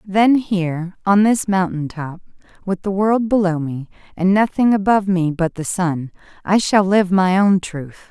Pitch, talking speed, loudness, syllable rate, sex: 190 Hz, 170 wpm, -17 LUFS, 4.4 syllables/s, female